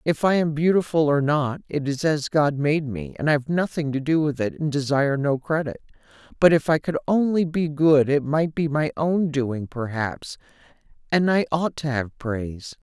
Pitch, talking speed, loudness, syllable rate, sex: 150 Hz, 205 wpm, -22 LUFS, 4.8 syllables/s, male